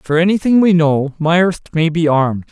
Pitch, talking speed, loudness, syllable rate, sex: 165 Hz, 190 wpm, -14 LUFS, 4.7 syllables/s, male